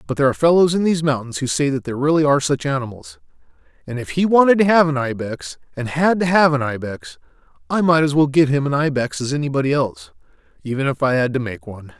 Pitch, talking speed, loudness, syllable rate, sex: 145 Hz, 235 wpm, -18 LUFS, 6.7 syllables/s, male